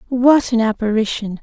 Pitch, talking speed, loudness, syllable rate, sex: 230 Hz, 125 wpm, -16 LUFS, 4.9 syllables/s, female